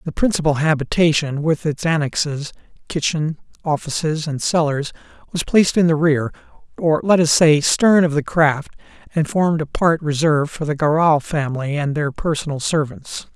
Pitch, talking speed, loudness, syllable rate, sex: 155 Hz, 145 wpm, -18 LUFS, 5.0 syllables/s, male